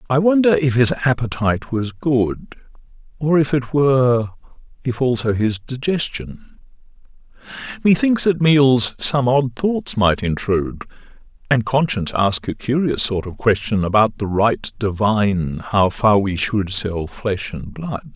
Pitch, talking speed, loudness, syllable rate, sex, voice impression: 120 Hz, 140 wpm, -18 LUFS, 4.1 syllables/s, male, masculine, adult-like, cool, slightly sincere, sweet